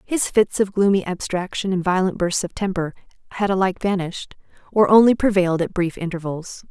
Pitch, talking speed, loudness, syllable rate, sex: 190 Hz, 170 wpm, -20 LUFS, 5.8 syllables/s, female